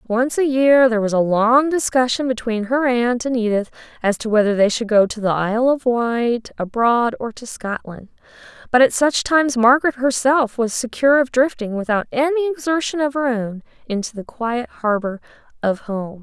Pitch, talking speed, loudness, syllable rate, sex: 240 Hz, 185 wpm, -18 LUFS, 5.0 syllables/s, female